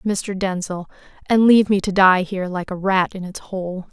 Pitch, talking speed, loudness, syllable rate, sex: 190 Hz, 215 wpm, -19 LUFS, 4.9 syllables/s, female